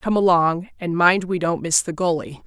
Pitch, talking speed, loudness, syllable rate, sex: 175 Hz, 220 wpm, -20 LUFS, 4.8 syllables/s, female